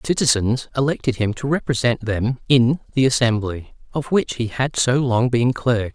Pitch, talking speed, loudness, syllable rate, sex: 125 Hz, 180 wpm, -20 LUFS, 4.8 syllables/s, male